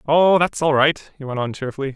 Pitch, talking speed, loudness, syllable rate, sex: 145 Hz, 245 wpm, -19 LUFS, 5.8 syllables/s, male